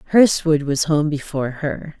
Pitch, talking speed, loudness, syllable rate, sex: 150 Hz, 150 wpm, -19 LUFS, 4.6 syllables/s, female